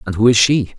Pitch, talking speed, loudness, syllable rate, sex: 115 Hz, 305 wpm, -13 LUFS, 6.1 syllables/s, male